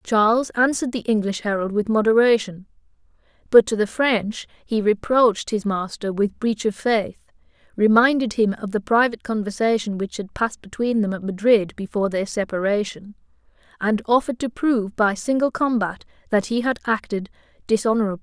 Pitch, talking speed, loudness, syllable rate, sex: 220 Hz, 155 wpm, -21 LUFS, 5.4 syllables/s, female